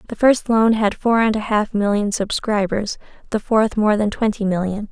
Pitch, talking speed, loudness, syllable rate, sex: 210 Hz, 195 wpm, -19 LUFS, 4.8 syllables/s, female